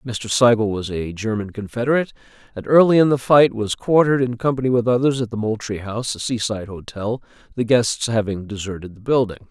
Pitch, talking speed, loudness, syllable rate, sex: 115 Hz, 190 wpm, -19 LUFS, 5.9 syllables/s, male